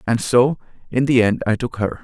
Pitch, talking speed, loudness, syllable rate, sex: 120 Hz, 235 wpm, -18 LUFS, 5.2 syllables/s, male